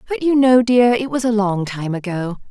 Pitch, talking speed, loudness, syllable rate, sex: 220 Hz, 240 wpm, -17 LUFS, 5.0 syllables/s, female